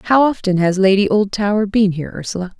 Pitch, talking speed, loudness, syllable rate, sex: 200 Hz, 185 wpm, -16 LUFS, 6.3 syllables/s, female